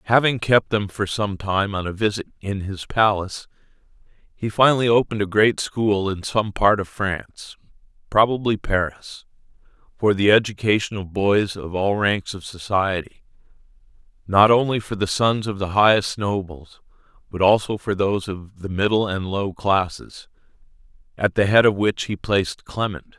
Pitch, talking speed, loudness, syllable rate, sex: 100 Hz, 155 wpm, -21 LUFS, 4.8 syllables/s, male